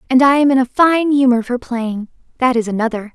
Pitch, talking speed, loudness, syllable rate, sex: 250 Hz, 210 wpm, -15 LUFS, 5.7 syllables/s, female